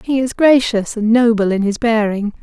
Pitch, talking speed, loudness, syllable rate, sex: 225 Hz, 200 wpm, -15 LUFS, 4.9 syllables/s, female